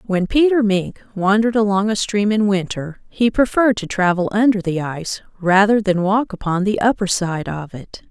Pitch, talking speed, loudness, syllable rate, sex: 200 Hz, 185 wpm, -18 LUFS, 5.1 syllables/s, female